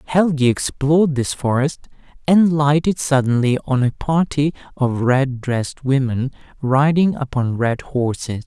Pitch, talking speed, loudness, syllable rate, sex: 135 Hz, 130 wpm, -18 LUFS, 4.3 syllables/s, male